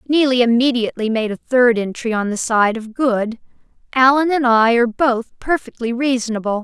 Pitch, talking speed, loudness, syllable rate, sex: 240 Hz, 165 wpm, -17 LUFS, 5.2 syllables/s, female